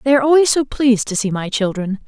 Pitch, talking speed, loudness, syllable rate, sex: 240 Hz, 260 wpm, -16 LUFS, 6.7 syllables/s, female